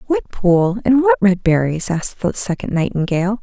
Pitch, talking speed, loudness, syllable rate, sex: 200 Hz, 160 wpm, -17 LUFS, 5.0 syllables/s, female